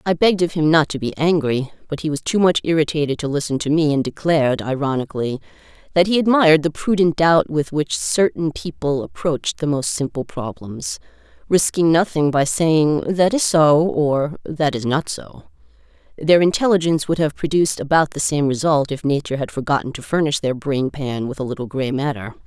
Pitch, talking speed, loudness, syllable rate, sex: 150 Hz, 190 wpm, -19 LUFS, 5.4 syllables/s, female